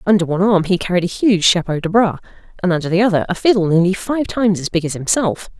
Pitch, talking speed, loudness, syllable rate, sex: 185 Hz, 245 wpm, -16 LUFS, 6.7 syllables/s, female